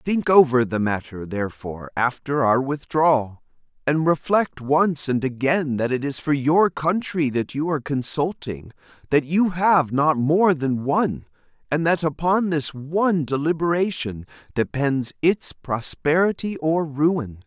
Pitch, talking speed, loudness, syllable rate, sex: 145 Hz, 140 wpm, -22 LUFS, 4.2 syllables/s, male